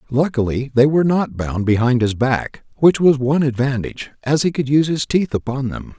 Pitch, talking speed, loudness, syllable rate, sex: 130 Hz, 200 wpm, -18 LUFS, 5.5 syllables/s, male